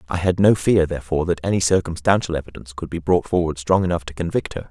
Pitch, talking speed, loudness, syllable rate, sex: 85 Hz, 230 wpm, -20 LUFS, 6.8 syllables/s, male